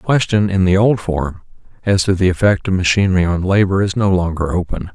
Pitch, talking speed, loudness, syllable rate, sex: 95 Hz, 220 wpm, -16 LUFS, 5.8 syllables/s, male